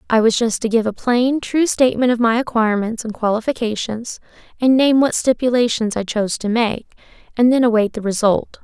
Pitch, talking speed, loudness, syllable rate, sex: 230 Hz, 190 wpm, -17 LUFS, 5.6 syllables/s, female